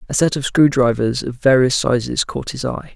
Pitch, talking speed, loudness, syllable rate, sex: 130 Hz, 225 wpm, -17 LUFS, 5.1 syllables/s, male